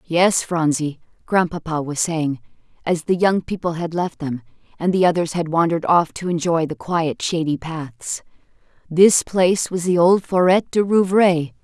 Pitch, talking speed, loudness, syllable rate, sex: 170 Hz, 165 wpm, -19 LUFS, 4.5 syllables/s, female